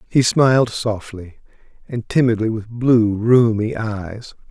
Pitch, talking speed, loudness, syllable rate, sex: 115 Hz, 120 wpm, -17 LUFS, 3.8 syllables/s, male